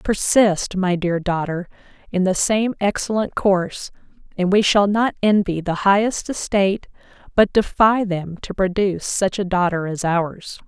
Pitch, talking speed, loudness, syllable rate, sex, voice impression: 190 Hz, 150 wpm, -19 LUFS, 4.4 syllables/s, female, slightly feminine, adult-like, intellectual, calm, slightly elegant, slightly sweet